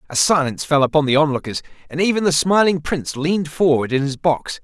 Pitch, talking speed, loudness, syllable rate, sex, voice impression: 155 Hz, 205 wpm, -18 LUFS, 6.2 syllables/s, male, masculine, adult-like, tensed, powerful, bright, clear, cool, intellectual, sincere, friendly, unique, wild, lively, slightly strict, intense